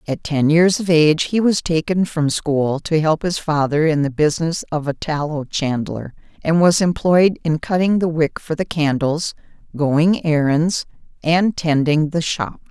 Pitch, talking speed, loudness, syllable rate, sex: 155 Hz, 175 wpm, -18 LUFS, 4.3 syllables/s, female